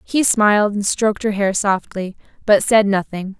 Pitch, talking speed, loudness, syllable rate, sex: 205 Hz, 175 wpm, -17 LUFS, 4.7 syllables/s, female